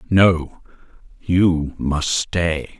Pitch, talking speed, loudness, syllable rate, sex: 85 Hz, 85 wpm, -19 LUFS, 2.1 syllables/s, male